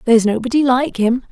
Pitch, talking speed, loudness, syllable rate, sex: 245 Hz, 180 wpm, -16 LUFS, 6.3 syllables/s, female